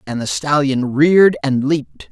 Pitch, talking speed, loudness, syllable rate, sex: 140 Hz, 170 wpm, -15 LUFS, 4.7 syllables/s, male